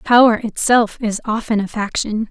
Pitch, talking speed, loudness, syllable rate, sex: 220 Hz, 155 wpm, -17 LUFS, 4.7 syllables/s, female